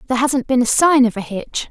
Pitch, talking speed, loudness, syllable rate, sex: 255 Hz, 280 wpm, -16 LUFS, 6.0 syllables/s, female